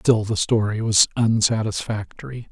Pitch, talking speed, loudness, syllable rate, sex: 110 Hz, 120 wpm, -20 LUFS, 4.6 syllables/s, male